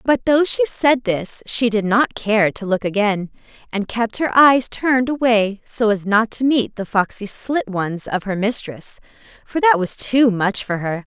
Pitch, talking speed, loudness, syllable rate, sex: 225 Hz, 200 wpm, -18 LUFS, 4.2 syllables/s, female